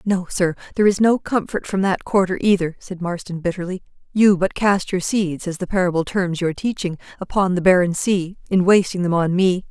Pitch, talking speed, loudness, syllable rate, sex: 185 Hz, 205 wpm, -19 LUFS, 5.3 syllables/s, female